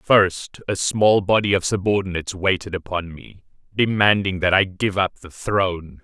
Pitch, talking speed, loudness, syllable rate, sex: 95 Hz, 160 wpm, -20 LUFS, 4.6 syllables/s, male